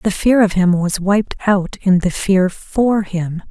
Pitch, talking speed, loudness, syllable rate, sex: 195 Hz, 205 wpm, -16 LUFS, 3.7 syllables/s, female